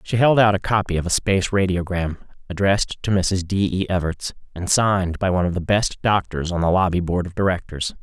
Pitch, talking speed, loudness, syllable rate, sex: 95 Hz, 215 wpm, -20 LUFS, 5.7 syllables/s, male